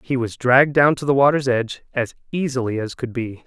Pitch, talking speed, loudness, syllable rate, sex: 130 Hz, 225 wpm, -19 LUFS, 5.8 syllables/s, male